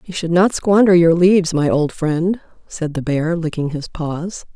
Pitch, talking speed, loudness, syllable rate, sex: 170 Hz, 200 wpm, -17 LUFS, 4.4 syllables/s, female